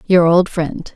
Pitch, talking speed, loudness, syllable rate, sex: 170 Hz, 190 wpm, -15 LUFS, 3.5 syllables/s, female